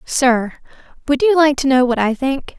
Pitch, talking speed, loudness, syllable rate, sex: 270 Hz, 210 wpm, -15 LUFS, 4.4 syllables/s, female